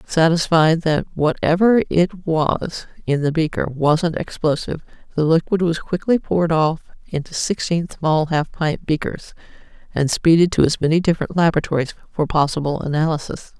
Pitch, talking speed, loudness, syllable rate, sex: 160 Hz, 140 wpm, -19 LUFS, 5.2 syllables/s, female